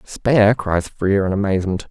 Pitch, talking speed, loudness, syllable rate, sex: 100 Hz, 160 wpm, -18 LUFS, 5.5 syllables/s, male